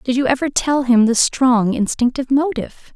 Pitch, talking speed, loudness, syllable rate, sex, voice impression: 255 Hz, 185 wpm, -16 LUFS, 5.3 syllables/s, female, feminine, adult-like, relaxed, slightly weak, soft, slightly muffled, slightly intellectual, calm, friendly, reassuring, elegant, kind, modest